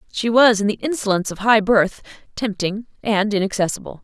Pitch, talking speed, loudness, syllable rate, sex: 210 Hz, 165 wpm, -19 LUFS, 5.7 syllables/s, female